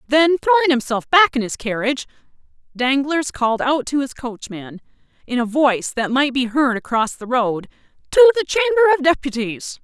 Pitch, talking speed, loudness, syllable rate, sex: 270 Hz, 170 wpm, -18 LUFS, 5.3 syllables/s, female